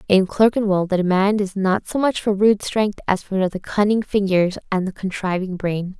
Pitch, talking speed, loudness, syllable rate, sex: 195 Hz, 200 wpm, -20 LUFS, 4.8 syllables/s, female